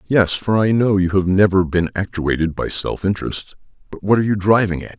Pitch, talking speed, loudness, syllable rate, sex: 95 Hz, 215 wpm, -18 LUFS, 5.6 syllables/s, male